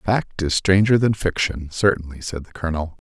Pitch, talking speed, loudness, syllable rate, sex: 90 Hz, 175 wpm, -21 LUFS, 5.1 syllables/s, male